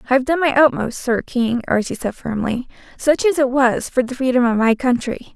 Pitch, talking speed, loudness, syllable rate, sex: 255 Hz, 225 wpm, -18 LUFS, 5.2 syllables/s, female